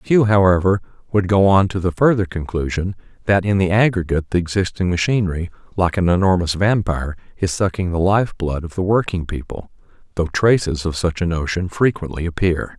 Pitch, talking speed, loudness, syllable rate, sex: 90 Hz, 170 wpm, -18 LUFS, 5.6 syllables/s, male